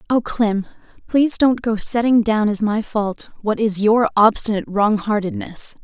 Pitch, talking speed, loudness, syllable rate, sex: 215 Hz, 155 wpm, -18 LUFS, 4.6 syllables/s, female